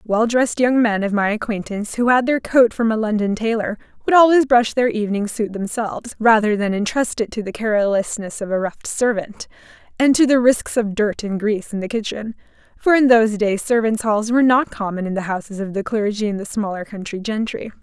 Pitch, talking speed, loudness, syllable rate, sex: 220 Hz, 215 wpm, -19 LUFS, 5.6 syllables/s, female